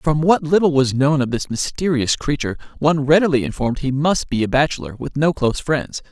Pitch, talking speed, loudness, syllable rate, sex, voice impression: 145 Hz, 205 wpm, -18 LUFS, 5.9 syllables/s, male, very masculine, slightly young, very adult-like, thick, tensed, powerful, very bright, slightly soft, very clear, very fluent, cool, very intellectual, very refreshing, very sincere, slightly calm, friendly, very reassuring, very unique, elegant, slightly wild, slightly sweet, very lively, very kind, intense, slightly modest, light